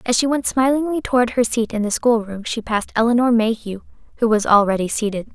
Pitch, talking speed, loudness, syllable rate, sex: 230 Hz, 200 wpm, -18 LUFS, 6.0 syllables/s, female